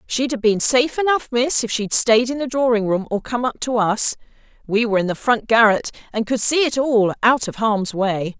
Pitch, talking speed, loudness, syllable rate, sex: 230 Hz, 235 wpm, -18 LUFS, 5.2 syllables/s, female